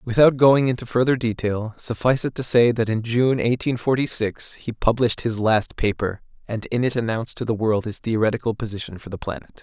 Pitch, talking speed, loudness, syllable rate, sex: 115 Hz, 205 wpm, -22 LUFS, 5.6 syllables/s, male